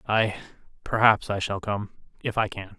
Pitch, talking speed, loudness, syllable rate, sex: 100 Hz, 170 wpm, -25 LUFS, 4.8 syllables/s, male